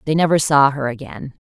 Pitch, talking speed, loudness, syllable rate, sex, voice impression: 140 Hz, 205 wpm, -16 LUFS, 5.7 syllables/s, female, feminine, very adult-like, very unique